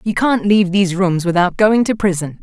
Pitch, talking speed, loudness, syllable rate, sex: 190 Hz, 220 wpm, -15 LUFS, 5.6 syllables/s, female